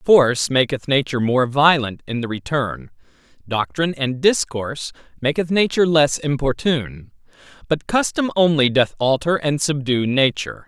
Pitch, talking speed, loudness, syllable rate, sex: 140 Hz, 130 wpm, -19 LUFS, 5.0 syllables/s, male